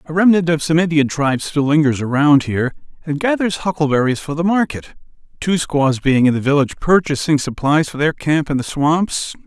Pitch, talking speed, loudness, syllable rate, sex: 150 Hz, 190 wpm, -16 LUFS, 5.4 syllables/s, male